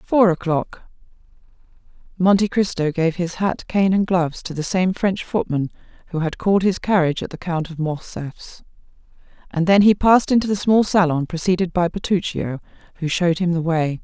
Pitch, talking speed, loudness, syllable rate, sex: 180 Hz, 175 wpm, -20 LUFS, 5.3 syllables/s, female